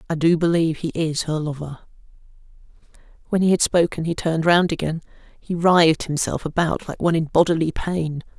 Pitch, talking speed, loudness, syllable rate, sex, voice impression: 165 Hz, 170 wpm, -20 LUFS, 5.7 syllables/s, female, very feminine, very middle-aged, slightly thin, tensed, slightly powerful, bright, very hard, very clear, very fluent, raspy, slightly cute, very intellectual, slightly refreshing, very sincere, very calm, friendly, reassuring, very unique, very elegant, very sweet, lively, very kind, very modest, light